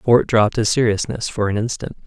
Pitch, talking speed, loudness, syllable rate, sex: 110 Hz, 205 wpm, -19 LUFS, 5.6 syllables/s, male